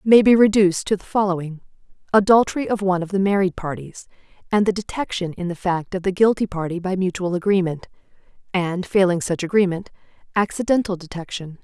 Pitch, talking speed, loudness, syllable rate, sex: 190 Hz, 165 wpm, -20 LUFS, 6.0 syllables/s, female